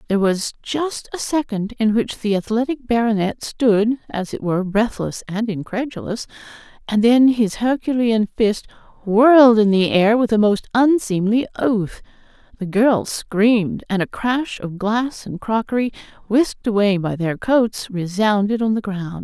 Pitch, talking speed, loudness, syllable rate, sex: 220 Hz, 155 wpm, -18 LUFS, 4.4 syllables/s, female